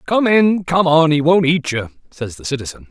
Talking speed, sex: 225 wpm, male